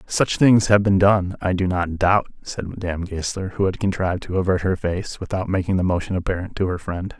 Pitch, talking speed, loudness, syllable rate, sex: 95 Hz, 225 wpm, -21 LUFS, 5.6 syllables/s, male